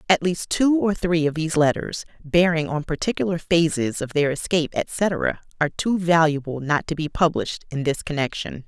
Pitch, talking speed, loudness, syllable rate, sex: 165 Hz, 180 wpm, -22 LUFS, 5.2 syllables/s, female